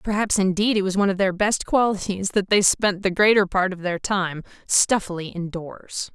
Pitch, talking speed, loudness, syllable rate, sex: 195 Hz, 195 wpm, -21 LUFS, 5.0 syllables/s, female